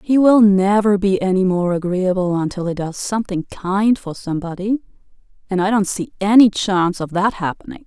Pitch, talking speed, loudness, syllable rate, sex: 195 Hz, 175 wpm, -17 LUFS, 5.3 syllables/s, female